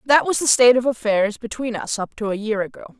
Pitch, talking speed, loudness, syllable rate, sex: 230 Hz, 260 wpm, -19 LUFS, 6.1 syllables/s, female